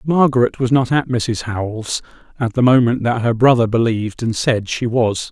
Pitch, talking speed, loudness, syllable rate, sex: 120 Hz, 190 wpm, -17 LUFS, 5.0 syllables/s, male